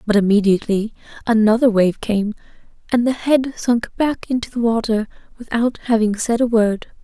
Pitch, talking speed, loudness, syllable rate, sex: 225 Hz, 155 wpm, -18 LUFS, 5.0 syllables/s, female